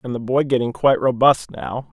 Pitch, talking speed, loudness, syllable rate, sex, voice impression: 125 Hz, 210 wpm, -19 LUFS, 5.4 syllables/s, male, masculine, middle-aged, slightly tensed, powerful, bright, muffled, slightly raspy, intellectual, mature, friendly, wild, slightly strict, slightly modest